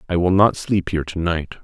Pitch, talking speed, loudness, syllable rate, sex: 85 Hz, 220 wpm, -19 LUFS, 5.8 syllables/s, male